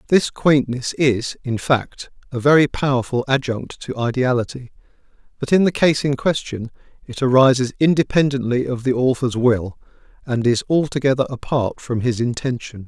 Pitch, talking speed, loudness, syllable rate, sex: 130 Hz, 145 wpm, -19 LUFS, 4.9 syllables/s, male